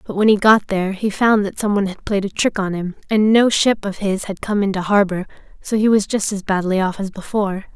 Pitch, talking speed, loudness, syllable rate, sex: 200 Hz, 265 wpm, -18 LUFS, 5.8 syllables/s, female